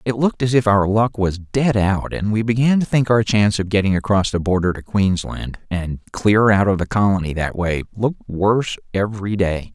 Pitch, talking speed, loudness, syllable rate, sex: 105 Hz, 215 wpm, -18 LUFS, 5.2 syllables/s, male